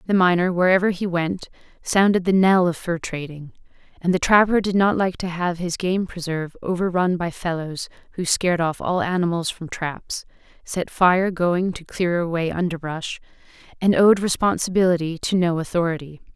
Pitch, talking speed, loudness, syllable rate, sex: 175 Hz, 165 wpm, -21 LUFS, 5.1 syllables/s, female